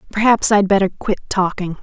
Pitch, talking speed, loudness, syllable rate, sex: 195 Hz, 165 wpm, -16 LUFS, 5.6 syllables/s, female